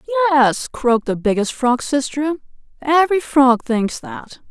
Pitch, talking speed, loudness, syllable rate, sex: 270 Hz, 135 wpm, -17 LUFS, 4.5 syllables/s, female